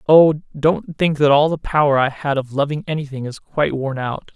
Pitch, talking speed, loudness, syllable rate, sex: 145 Hz, 220 wpm, -18 LUFS, 5.1 syllables/s, male